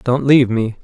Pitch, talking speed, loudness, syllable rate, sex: 125 Hz, 215 wpm, -14 LUFS, 5.6 syllables/s, male